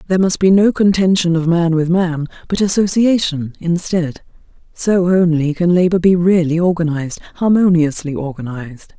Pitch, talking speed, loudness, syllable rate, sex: 170 Hz, 140 wpm, -15 LUFS, 5.1 syllables/s, female